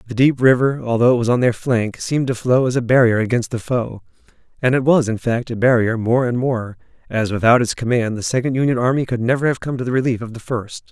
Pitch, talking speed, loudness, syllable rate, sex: 120 Hz, 255 wpm, -18 LUFS, 6.1 syllables/s, male